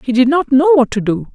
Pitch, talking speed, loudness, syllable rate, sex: 260 Hz, 310 wpm, -13 LUFS, 6.0 syllables/s, female